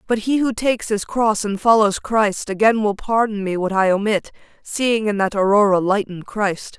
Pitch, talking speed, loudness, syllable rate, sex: 210 Hz, 195 wpm, -18 LUFS, 4.8 syllables/s, female